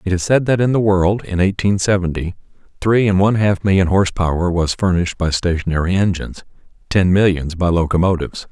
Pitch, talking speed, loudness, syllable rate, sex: 95 Hz, 185 wpm, -16 LUFS, 6.0 syllables/s, male